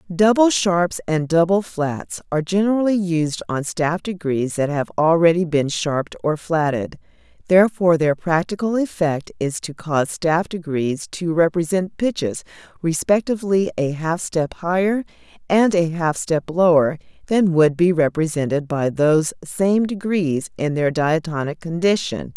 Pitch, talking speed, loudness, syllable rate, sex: 170 Hz, 140 wpm, -19 LUFS, 4.5 syllables/s, female